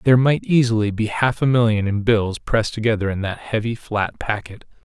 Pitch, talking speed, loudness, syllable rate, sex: 110 Hz, 195 wpm, -20 LUFS, 5.5 syllables/s, male